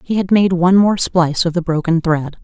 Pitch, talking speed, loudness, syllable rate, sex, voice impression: 175 Hz, 245 wpm, -15 LUFS, 5.7 syllables/s, female, feminine, adult-like, slightly middle-aged, thin, slightly tensed, slightly weak, slightly dark, slightly soft, clear, fluent, slightly cute, intellectual, slightly refreshing, slightly sincere, calm, slightly reassuring, slightly unique, elegant, slightly sweet, slightly lively, kind, slightly modest